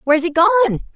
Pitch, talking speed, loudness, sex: 335 Hz, 190 wpm, -15 LUFS, female